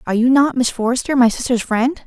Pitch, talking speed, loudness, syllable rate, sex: 245 Hz, 230 wpm, -16 LUFS, 6.2 syllables/s, female